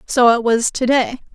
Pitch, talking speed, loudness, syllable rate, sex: 245 Hz, 225 wpm, -16 LUFS, 4.5 syllables/s, female